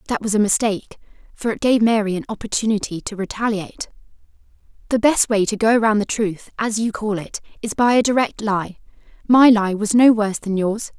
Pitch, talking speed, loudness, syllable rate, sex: 215 Hz, 195 wpm, -19 LUFS, 5.7 syllables/s, female